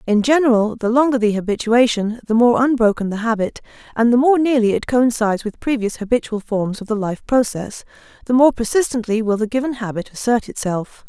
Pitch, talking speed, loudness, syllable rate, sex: 230 Hz, 185 wpm, -18 LUFS, 5.7 syllables/s, female